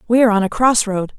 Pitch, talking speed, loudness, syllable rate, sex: 220 Hz, 305 wpm, -15 LUFS, 6.9 syllables/s, female